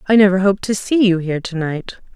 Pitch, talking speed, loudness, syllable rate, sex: 190 Hz, 250 wpm, -16 LUFS, 6.6 syllables/s, female